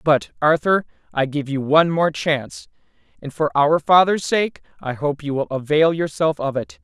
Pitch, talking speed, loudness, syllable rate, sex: 155 Hz, 185 wpm, -19 LUFS, 4.8 syllables/s, female